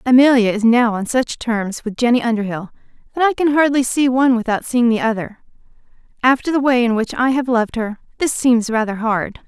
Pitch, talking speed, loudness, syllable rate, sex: 240 Hz, 205 wpm, -17 LUFS, 5.6 syllables/s, female